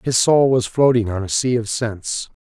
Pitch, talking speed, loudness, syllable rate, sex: 120 Hz, 220 wpm, -18 LUFS, 4.9 syllables/s, male